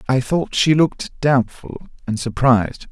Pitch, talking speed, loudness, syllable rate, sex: 130 Hz, 145 wpm, -18 LUFS, 4.5 syllables/s, male